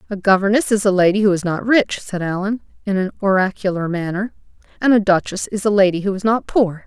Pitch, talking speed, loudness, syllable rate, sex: 195 Hz, 220 wpm, -18 LUFS, 6.0 syllables/s, female